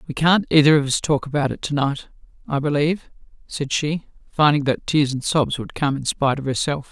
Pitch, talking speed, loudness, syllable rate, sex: 145 Hz, 215 wpm, -20 LUFS, 5.6 syllables/s, female